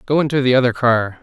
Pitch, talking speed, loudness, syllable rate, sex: 125 Hz, 245 wpm, -16 LUFS, 6.3 syllables/s, male